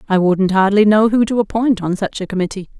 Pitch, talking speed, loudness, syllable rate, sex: 200 Hz, 235 wpm, -15 LUFS, 5.9 syllables/s, female